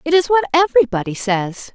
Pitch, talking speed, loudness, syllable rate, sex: 280 Hz, 170 wpm, -16 LUFS, 5.7 syllables/s, female